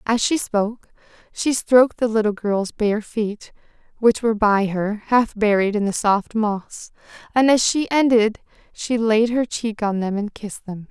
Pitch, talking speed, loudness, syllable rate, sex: 220 Hz, 180 wpm, -20 LUFS, 4.3 syllables/s, female